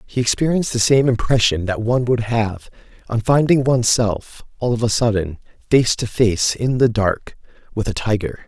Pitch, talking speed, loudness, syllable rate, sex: 115 Hz, 185 wpm, -18 LUFS, 5.1 syllables/s, male